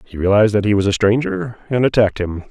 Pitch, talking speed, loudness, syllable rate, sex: 105 Hz, 240 wpm, -16 LUFS, 6.6 syllables/s, male